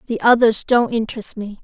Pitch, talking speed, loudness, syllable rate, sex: 230 Hz, 185 wpm, -17 LUFS, 5.7 syllables/s, female